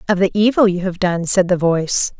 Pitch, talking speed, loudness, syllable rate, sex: 185 Hz, 245 wpm, -16 LUFS, 5.5 syllables/s, female